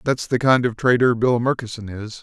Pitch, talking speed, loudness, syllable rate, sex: 120 Hz, 215 wpm, -19 LUFS, 5.2 syllables/s, male